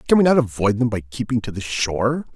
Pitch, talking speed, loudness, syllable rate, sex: 115 Hz, 255 wpm, -20 LUFS, 6.2 syllables/s, male